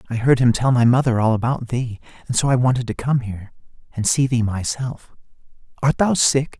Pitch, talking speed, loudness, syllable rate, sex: 125 Hz, 210 wpm, -19 LUFS, 5.6 syllables/s, male